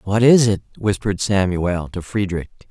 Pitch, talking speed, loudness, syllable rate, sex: 100 Hz, 155 wpm, -19 LUFS, 4.9 syllables/s, male